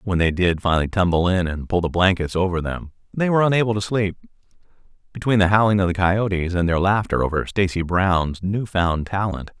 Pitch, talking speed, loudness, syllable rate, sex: 95 Hz, 200 wpm, -20 LUFS, 5.7 syllables/s, male